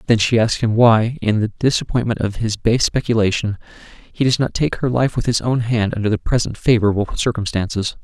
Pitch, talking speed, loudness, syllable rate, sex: 110 Hz, 200 wpm, -18 LUFS, 5.6 syllables/s, male